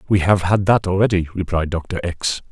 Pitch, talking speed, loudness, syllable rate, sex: 95 Hz, 190 wpm, -19 LUFS, 5.1 syllables/s, male